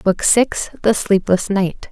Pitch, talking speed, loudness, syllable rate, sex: 200 Hz, 125 wpm, -16 LUFS, 3.3 syllables/s, female